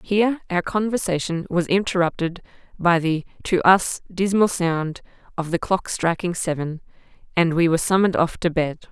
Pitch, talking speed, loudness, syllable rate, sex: 175 Hz, 155 wpm, -21 LUFS, 5.0 syllables/s, female